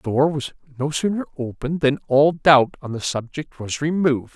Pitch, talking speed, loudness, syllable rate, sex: 140 Hz, 195 wpm, -20 LUFS, 5.3 syllables/s, male